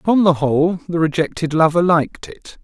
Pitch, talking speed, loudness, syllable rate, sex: 165 Hz, 180 wpm, -16 LUFS, 5.7 syllables/s, male